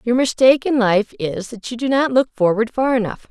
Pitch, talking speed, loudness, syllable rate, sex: 235 Hz, 235 wpm, -17 LUFS, 5.4 syllables/s, female